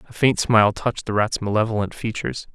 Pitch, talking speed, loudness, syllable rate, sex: 110 Hz, 190 wpm, -21 LUFS, 6.4 syllables/s, male